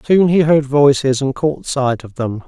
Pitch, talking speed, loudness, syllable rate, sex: 140 Hz, 220 wpm, -15 LUFS, 4.3 syllables/s, male